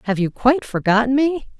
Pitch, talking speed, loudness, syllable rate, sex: 245 Hz, 190 wpm, -18 LUFS, 5.8 syllables/s, female